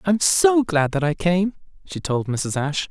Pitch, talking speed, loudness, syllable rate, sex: 170 Hz, 225 wpm, -20 LUFS, 4.9 syllables/s, male